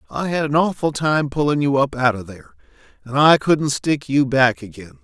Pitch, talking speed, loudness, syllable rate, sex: 140 Hz, 215 wpm, -18 LUFS, 5.2 syllables/s, male